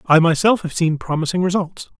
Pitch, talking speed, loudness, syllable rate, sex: 170 Hz, 180 wpm, -18 LUFS, 5.6 syllables/s, male